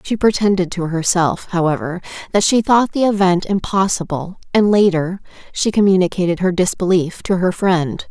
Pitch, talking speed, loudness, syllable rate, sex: 185 Hz, 150 wpm, -16 LUFS, 5.0 syllables/s, female